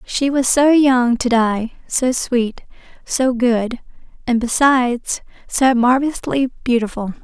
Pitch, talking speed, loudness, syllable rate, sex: 250 Hz, 125 wpm, -17 LUFS, 3.9 syllables/s, female